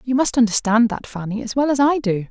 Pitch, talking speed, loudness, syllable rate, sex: 235 Hz, 260 wpm, -19 LUFS, 5.9 syllables/s, female